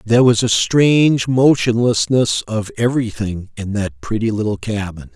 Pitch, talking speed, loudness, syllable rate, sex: 115 Hz, 140 wpm, -16 LUFS, 4.7 syllables/s, male